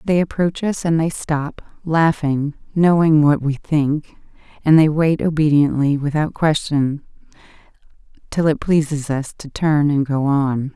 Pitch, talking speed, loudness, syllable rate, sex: 150 Hz, 145 wpm, -18 LUFS, 4.1 syllables/s, female